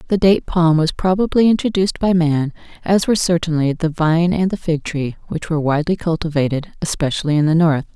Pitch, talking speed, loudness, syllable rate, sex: 165 Hz, 190 wpm, -17 LUFS, 5.9 syllables/s, female